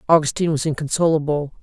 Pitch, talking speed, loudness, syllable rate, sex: 155 Hz, 110 wpm, -20 LUFS, 6.9 syllables/s, female